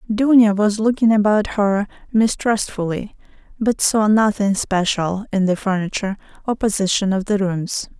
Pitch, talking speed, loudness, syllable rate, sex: 205 Hz, 135 wpm, -18 LUFS, 4.6 syllables/s, female